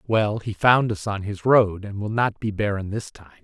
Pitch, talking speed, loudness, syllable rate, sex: 105 Hz, 245 wpm, -22 LUFS, 4.8 syllables/s, male